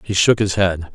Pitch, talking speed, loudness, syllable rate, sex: 95 Hz, 255 wpm, -17 LUFS, 4.8 syllables/s, male